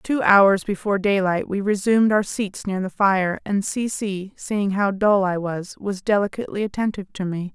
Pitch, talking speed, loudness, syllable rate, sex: 200 Hz, 200 wpm, -21 LUFS, 5.0 syllables/s, female